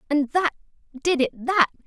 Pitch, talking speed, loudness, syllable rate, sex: 295 Hz, 130 wpm, -23 LUFS, 6.1 syllables/s, female